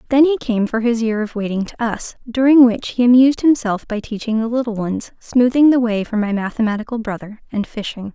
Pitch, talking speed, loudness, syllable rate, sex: 230 Hz, 215 wpm, -17 LUFS, 5.6 syllables/s, female